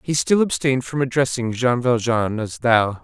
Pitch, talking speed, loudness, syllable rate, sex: 120 Hz, 180 wpm, -20 LUFS, 4.8 syllables/s, male